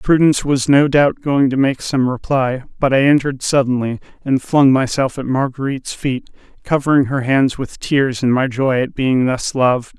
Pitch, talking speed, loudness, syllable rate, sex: 135 Hz, 185 wpm, -16 LUFS, 4.9 syllables/s, male